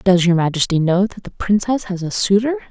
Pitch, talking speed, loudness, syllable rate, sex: 195 Hz, 220 wpm, -17 LUFS, 5.5 syllables/s, female